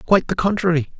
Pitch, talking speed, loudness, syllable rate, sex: 175 Hz, 180 wpm, -19 LUFS, 6.6 syllables/s, male